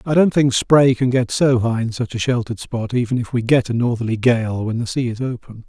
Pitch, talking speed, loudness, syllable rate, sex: 120 Hz, 265 wpm, -18 LUFS, 5.6 syllables/s, male